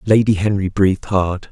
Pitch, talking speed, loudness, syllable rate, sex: 100 Hz, 160 wpm, -17 LUFS, 5.1 syllables/s, male